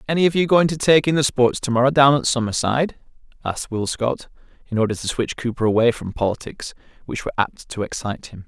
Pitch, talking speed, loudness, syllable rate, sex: 130 Hz, 210 wpm, -20 LUFS, 6.3 syllables/s, male